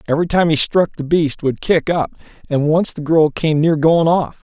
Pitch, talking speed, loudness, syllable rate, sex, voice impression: 160 Hz, 225 wpm, -16 LUFS, 5.0 syllables/s, male, masculine, adult-like, slightly intellectual, slightly calm